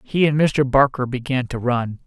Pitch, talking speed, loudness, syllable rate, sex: 130 Hz, 205 wpm, -19 LUFS, 4.7 syllables/s, male